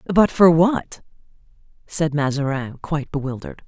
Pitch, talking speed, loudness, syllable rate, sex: 155 Hz, 115 wpm, -20 LUFS, 4.8 syllables/s, female